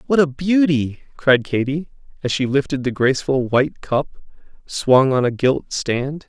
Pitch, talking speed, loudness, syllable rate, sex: 140 Hz, 160 wpm, -19 LUFS, 4.4 syllables/s, male